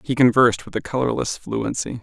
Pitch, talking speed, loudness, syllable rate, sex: 120 Hz, 180 wpm, -20 LUFS, 5.7 syllables/s, male